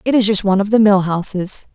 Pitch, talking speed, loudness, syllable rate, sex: 200 Hz, 275 wpm, -15 LUFS, 6.3 syllables/s, female